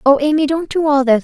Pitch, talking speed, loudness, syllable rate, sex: 290 Hz, 290 wpm, -15 LUFS, 6.2 syllables/s, female